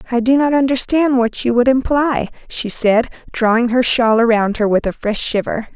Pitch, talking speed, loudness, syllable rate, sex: 245 Hz, 200 wpm, -15 LUFS, 4.8 syllables/s, female